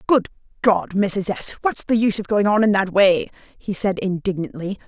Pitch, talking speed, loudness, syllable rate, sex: 200 Hz, 195 wpm, -20 LUFS, 4.9 syllables/s, female